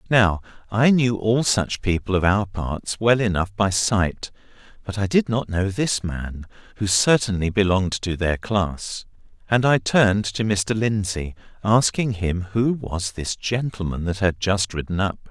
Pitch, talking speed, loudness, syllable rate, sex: 100 Hz, 170 wpm, -21 LUFS, 4.2 syllables/s, male